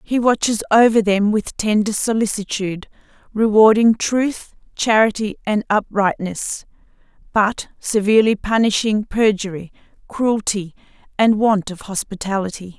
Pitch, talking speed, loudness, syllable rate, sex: 210 Hz, 100 wpm, -18 LUFS, 4.4 syllables/s, female